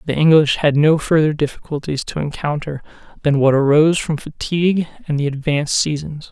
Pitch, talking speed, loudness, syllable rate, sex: 150 Hz, 160 wpm, -17 LUFS, 5.7 syllables/s, male